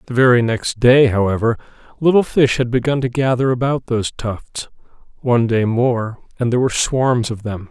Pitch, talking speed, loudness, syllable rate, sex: 120 Hz, 180 wpm, -17 LUFS, 5.4 syllables/s, male